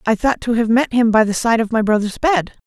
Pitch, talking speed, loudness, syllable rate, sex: 230 Hz, 295 wpm, -16 LUFS, 5.6 syllables/s, female